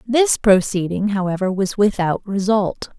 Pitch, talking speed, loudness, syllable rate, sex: 200 Hz, 120 wpm, -18 LUFS, 4.2 syllables/s, female